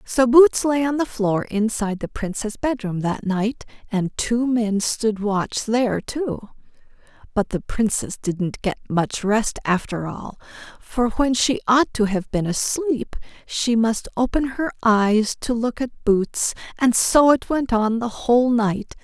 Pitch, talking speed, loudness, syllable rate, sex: 225 Hz, 165 wpm, -21 LUFS, 3.8 syllables/s, female